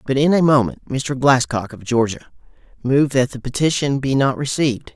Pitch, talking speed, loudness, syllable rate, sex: 130 Hz, 180 wpm, -18 LUFS, 5.4 syllables/s, male